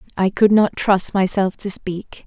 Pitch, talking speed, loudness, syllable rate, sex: 195 Hz, 185 wpm, -18 LUFS, 4.2 syllables/s, female